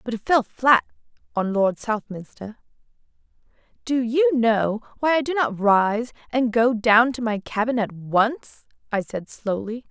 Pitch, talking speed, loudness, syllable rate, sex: 230 Hz, 160 wpm, -22 LUFS, 4.1 syllables/s, female